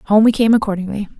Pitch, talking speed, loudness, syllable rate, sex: 210 Hz, 200 wpm, -15 LUFS, 6.5 syllables/s, female